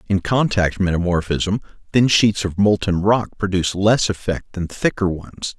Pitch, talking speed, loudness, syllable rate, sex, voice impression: 95 Hz, 150 wpm, -19 LUFS, 4.6 syllables/s, male, masculine, adult-like, slightly thick, slightly cool, intellectual, friendly, slightly elegant